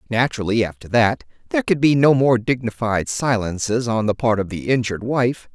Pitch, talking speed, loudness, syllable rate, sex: 115 Hz, 185 wpm, -19 LUFS, 5.6 syllables/s, male